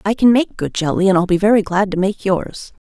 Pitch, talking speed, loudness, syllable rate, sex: 195 Hz, 270 wpm, -16 LUFS, 5.6 syllables/s, female